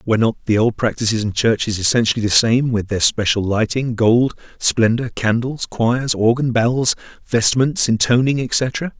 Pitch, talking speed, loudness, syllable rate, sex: 115 Hz, 155 wpm, -17 LUFS, 4.6 syllables/s, male